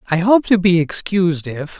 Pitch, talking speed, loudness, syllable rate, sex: 180 Hz, 200 wpm, -16 LUFS, 5.1 syllables/s, male